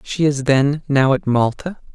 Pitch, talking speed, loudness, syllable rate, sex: 140 Hz, 185 wpm, -17 LUFS, 4.1 syllables/s, male